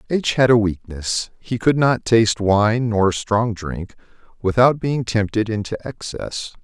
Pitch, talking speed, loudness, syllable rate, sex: 110 Hz, 155 wpm, -19 LUFS, 4.0 syllables/s, male